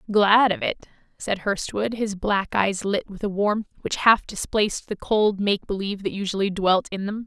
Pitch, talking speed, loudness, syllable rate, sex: 200 Hz, 200 wpm, -23 LUFS, 4.8 syllables/s, female